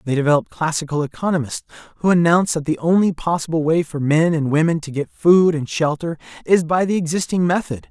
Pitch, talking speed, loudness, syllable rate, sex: 160 Hz, 190 wpm, -18 LUFS, 5.9 syllables/s, male